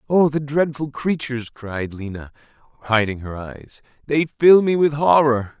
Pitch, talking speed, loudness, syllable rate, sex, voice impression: 130 Hz, 150 wpm, -19 LUFS, 4.4 syllables/s, male, masculine, adult-like, tensed, powerful, slightly hard, clear, intellectual, calm, wild, lively, slightly kind